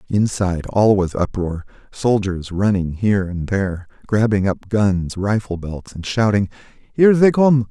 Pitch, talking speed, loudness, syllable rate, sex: 100 Hz, 150 wpm, -18 LUFS, 4.5 syllables/s, male